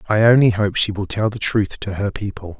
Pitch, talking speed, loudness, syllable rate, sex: 105 Hz, 255 wpm, -18 LUFS, 5.4 syllables/s, male